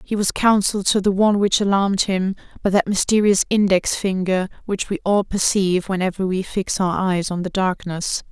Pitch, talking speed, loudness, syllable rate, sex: 195 Hz, 190 wpm, -19 LUFS, 5.3 syllables/s, female